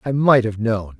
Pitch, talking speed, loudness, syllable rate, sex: 115 Hz, 240 wpm, -18 LUFS, 4.6 syllables/s, male